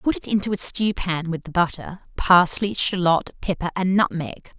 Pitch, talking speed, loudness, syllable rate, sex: 180 Hz, 170 wpm, -21 LUFS, 4.6 syllables/s, female